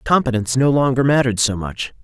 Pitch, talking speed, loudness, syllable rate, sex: 125 Hz, 175 wpm, -17 LUFS, 6.4 syllables/s, male